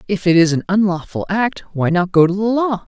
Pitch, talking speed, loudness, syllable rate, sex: 190 Hz, 225 wpm, -16 LUFS, 5.0 syllables/s, female